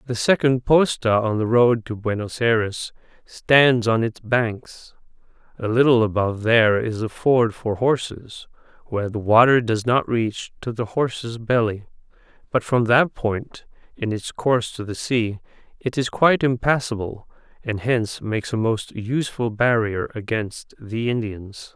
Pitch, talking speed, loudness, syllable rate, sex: 115 Hz, 155 wpm, -21 LUFS, 4.4 syllables/s, male